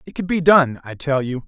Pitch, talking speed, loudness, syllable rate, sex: 145 Hz, 285 wpm, -18 LUFS, 5.5 syllables/s, male